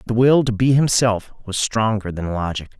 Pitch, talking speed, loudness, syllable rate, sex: 110 Hz, 215 wpm, -19 LUFS, 5.2 syllables/s, male